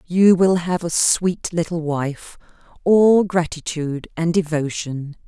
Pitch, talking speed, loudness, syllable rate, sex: 170 Hz, 125 wpm, -19 LUFS, 3.8 syllables/s, female